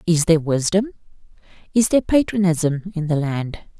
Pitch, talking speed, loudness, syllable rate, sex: 175 Hz, 140 wpm, -19 LUFS, 5.3 syllables/s, female